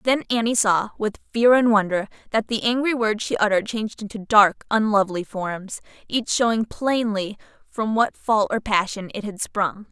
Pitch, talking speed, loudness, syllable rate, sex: 215 Hz, 175 wpm, -21 LUFS, 4.8 syllables/s, female